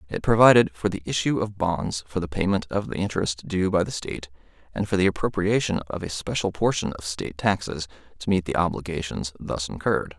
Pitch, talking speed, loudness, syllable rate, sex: 90 Hz, 200 wpm, -24 LUFS, 5.8 syllables/s, male